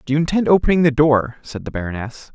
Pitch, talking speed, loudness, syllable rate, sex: 140 Hz, 230 wpm, -17 LUFS, 6.4 syllables/s, male